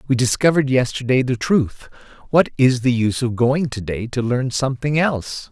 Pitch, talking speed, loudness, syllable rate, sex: 130 Hz, 185 wpm, -19 LUFS, 5.4 syllables/s, male